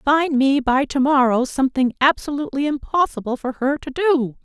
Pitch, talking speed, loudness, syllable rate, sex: 275 Hz, 160 wpm, -19 LUFS, 5.2 syllables/s, female